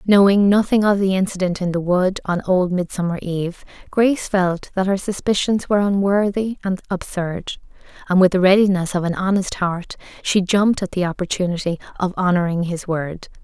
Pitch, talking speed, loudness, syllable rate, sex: 185 Hz, 170 wpm, -19 LUFS, 5.3 syllables/s, female